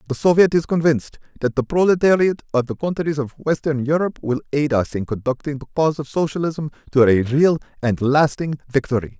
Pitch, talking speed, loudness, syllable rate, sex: 145 Hz, 185 wpm, -19 LUFS, 5.9 syllables/s, male